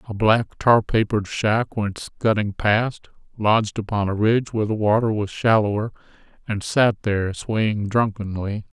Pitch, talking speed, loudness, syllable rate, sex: 105 Hz, 150 wpm, -21 LUFS, 4.6 syllables/s, male